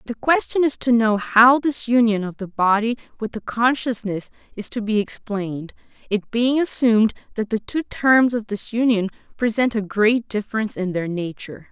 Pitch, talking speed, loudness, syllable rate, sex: 225 Hz, 180 wpm, -20 LUFS, 5.0 syllables/s, female